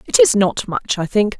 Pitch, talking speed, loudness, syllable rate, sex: 215 Hz, 255 wpm, -17 LUFS, 4.7 syllables/s, female